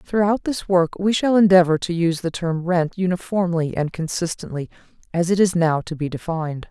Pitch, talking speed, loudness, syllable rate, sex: 175 Hz, 190 wpm, -20 LUFS, 5.4 syllables/s, female